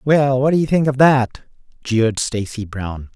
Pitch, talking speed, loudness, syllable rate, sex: 125 Hz, 190 wpm, -17 LUFS, 4.5 syllables/s, male